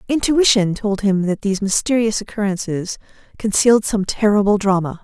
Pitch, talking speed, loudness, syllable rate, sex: 205 Hz, 130 wpm, -17 LUFS, 5.4 syllables/s, female